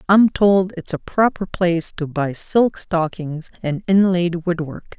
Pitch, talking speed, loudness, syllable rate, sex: 175 Hz, 170 wpm, -19 LUFS, 4.0 syllables/s, female